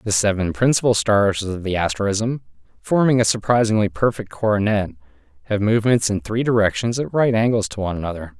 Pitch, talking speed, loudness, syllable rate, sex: 105 Hz, 165 wpm, -19 LUFS, 5.8 syllables/s, male